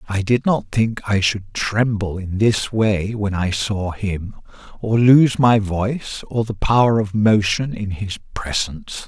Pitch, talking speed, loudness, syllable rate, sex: 105 Hz, 170 wpm, -19 LUFS, 3.9 syllables/s, male